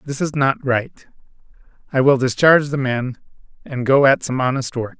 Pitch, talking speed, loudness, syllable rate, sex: 135 Hz, 180 wpm, -17 LUFS, 5.0 syllables/s, male